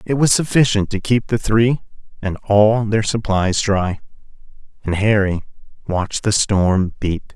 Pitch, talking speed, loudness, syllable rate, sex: 105 Hz, 145 wpm, -18 LUFS, 4.2 syllables/s, male